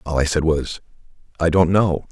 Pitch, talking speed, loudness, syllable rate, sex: 80 Hz, 200 wpm, -19 LUFS, 4.9 syllables/s, male